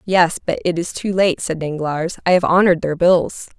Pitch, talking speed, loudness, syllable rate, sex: 175 Hz, 220 wpm, -17 LUFS, 5.0 syllables/s, female